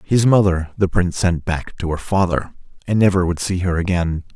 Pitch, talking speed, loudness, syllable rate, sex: 90 Hz, 205 wpm, -19 LUFS, 5.3 syllables/s, male